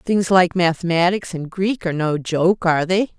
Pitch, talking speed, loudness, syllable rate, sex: 175 Hz, 190 wpm, -18 LUFS, 4.9 syllables/s, female